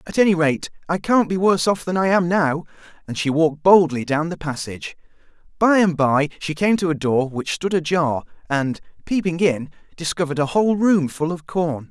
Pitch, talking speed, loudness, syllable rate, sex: 165 Hz, 200 wpm, -20 LUFS, 5.3 syllables/s, male